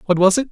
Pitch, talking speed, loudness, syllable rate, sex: 200 Hz, 345 wpm, -16 LUFS, 8.6 syllables/s, male